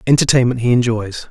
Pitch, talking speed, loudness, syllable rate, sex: 120 Hz, 140 wpm, -15 LUFS, 6.0 syllables/s, male